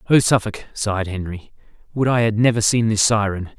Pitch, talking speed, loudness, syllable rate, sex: 110 Hz, 185 wpm, -19 LUFS, 5.6 syllables/s, male